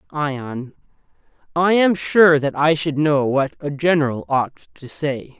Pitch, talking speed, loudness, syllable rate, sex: 150 Hz, 155 wpm, -18 LUFS, 3.7 syllables/s, male